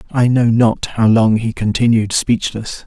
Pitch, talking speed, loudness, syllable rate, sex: 115 Hz, 165 wpm, -15 LUFS, 4.1 syllables/s, male